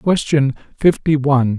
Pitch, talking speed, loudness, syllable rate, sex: 145 Hz, 115 wpm, -16 LUFS, 4.4 syllables/s, male